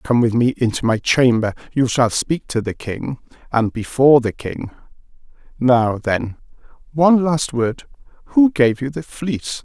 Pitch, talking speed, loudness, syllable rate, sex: 125 Hz, 150 wpm, -18 LUFS, 4.4 syllables/s, male